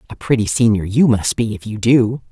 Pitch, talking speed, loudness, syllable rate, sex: 115 Hz, 235 wpm, -16 LUFS, 5.4 syllables/s, female